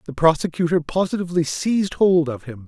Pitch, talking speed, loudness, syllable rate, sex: 165 Hz, 155 wpm, -20 LUFS, 5.9 syllables/s, male